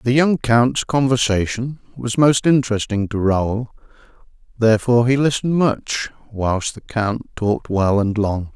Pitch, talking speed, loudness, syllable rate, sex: 115 Hz, 140 wpm, -18 LUFS, 4.4 syllables/s, male